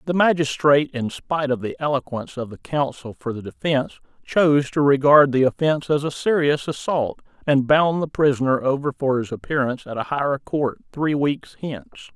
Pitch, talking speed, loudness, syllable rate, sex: 140 Hz, 185 wpm, -21 LUFS, 5.6 syllables/s, male